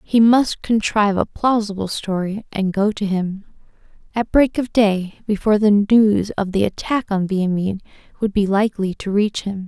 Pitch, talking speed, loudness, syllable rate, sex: 205 Hz, 175 wpm, -19 LUFS, 4.8 syllables/s, female